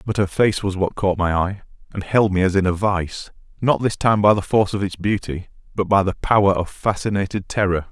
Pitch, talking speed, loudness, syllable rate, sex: 100 Hz, 235 wpm, -20 LUFS, 5.4 syllables/s, male